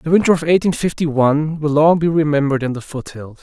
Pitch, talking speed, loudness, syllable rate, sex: 150 Hz, 230 wpm, -16 LUFS, 6.2 syllables/s, male